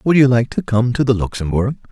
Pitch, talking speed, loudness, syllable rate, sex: 120 Hz, 250 wpm, -16 LUFS, 5.7 syllables/s, male